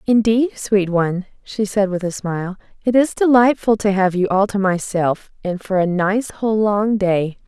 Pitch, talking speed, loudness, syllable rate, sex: 200 Hz, 195 wpm, -18 LUFS, 4.7 syllables/s, female